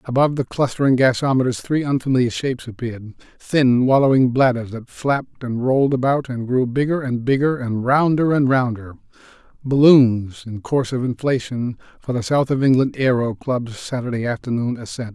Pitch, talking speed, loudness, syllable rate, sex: 125 Hz, 155 wpm, -19 LUFS, 5.4 syllables/s, male